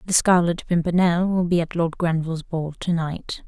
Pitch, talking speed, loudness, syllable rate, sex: 170 Hz, 190 wpm, -22 LUFS, 4.9 syllables/s, female